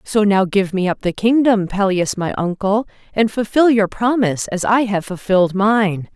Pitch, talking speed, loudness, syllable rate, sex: 205 Hz, 185 wpm, -17 LUFS, 4.7 syllables/s, female